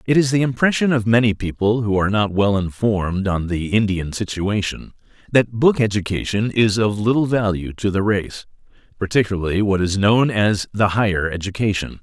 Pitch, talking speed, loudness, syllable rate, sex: 105 Hz, 170 wpm, -19 LUFS, 5.2 syllables/s, male